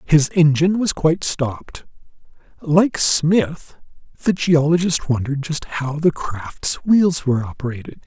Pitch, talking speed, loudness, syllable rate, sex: 155 Hz, 125 wpm, -18 LUFS, 4.3 syllables/s, male